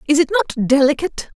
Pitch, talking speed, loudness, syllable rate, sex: 290 Hz, 170 wpm, -17 LUFS, 7.6 syllables/s, female